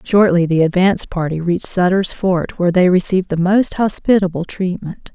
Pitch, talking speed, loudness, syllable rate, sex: 180 Hz, 165 wpm, -16 LUFS, 5.4 syllables/s, female